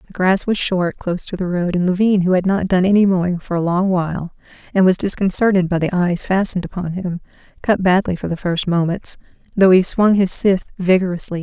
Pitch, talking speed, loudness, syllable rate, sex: 185 Hz, 215 wpm, -17 LUFS, 5.8 syllables/s, female